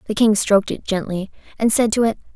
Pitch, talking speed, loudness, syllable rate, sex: 210 Hz, 230 wpm, -19 LUFS, 6.3 syllables/s, female